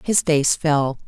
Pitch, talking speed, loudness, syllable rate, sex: 150 Hz, 165 wpm, -19 LUFS, 3.3 syllables/s, female